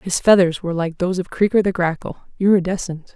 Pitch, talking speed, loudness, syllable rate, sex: 180 Hz, 170 wpm, -18 LUFS, 6.1 syllables/s, female